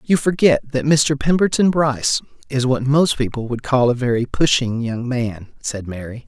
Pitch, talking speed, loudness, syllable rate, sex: 130 Hz, 180 wpm, -18 LUFS, 4.7 syllables/s, male